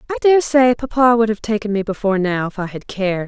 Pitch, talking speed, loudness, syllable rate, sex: 220 Hz, 255 wpm, -17 LUFS, 6.3 syllables/s, female